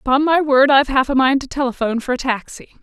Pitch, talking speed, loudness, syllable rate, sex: 265 Hz, 255 wpm, -16 LUFS, 6.7 syllables/s, female